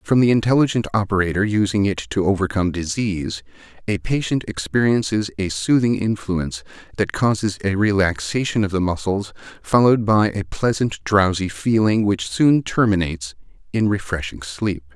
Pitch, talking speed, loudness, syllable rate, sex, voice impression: 100 Hz, 135 wpm, -20 LUFS, 5.2 syllables/s, male, very masculine, adult-like, slightly thick, cool, slightly refreshing, sincere, reassuring, slightly elegant